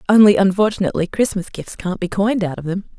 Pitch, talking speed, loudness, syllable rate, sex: 195 Hz, 200 wpm, -18 LUFS, 6.8 syllables/s, female